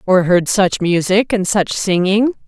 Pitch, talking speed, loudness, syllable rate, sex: 195 Hz, 170 wpm, -15 LUFS, 4.1 syllables/s, female